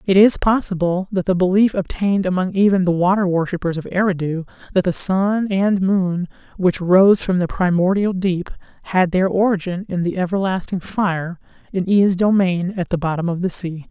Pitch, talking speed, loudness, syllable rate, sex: 185 Hz, 175 wpm, -18 LUFS, 5.0 syllables/s, female